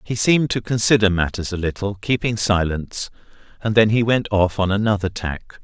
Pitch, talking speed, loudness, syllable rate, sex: 105 Hz, 180 wpm, -19 LUFS, 5.4 syllables/s, male